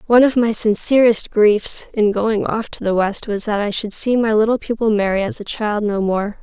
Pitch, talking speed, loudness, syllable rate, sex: 215 Hz, 235 wpm, -17 LUFS, 5.0 syllables/s, female